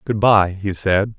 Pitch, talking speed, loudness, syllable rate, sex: 100 Hz, 200 wpm, -17 LUFS, 3.9 syllables/s, male